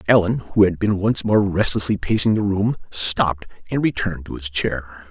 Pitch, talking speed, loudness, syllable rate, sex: 95 Hz, 190 wpm, -20 LUFS, 5.1 syllables/s, male